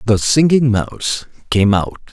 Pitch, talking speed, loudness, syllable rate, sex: 115 Hz, 140 wpm, -15 LUFS, 4.3 syllables/s, male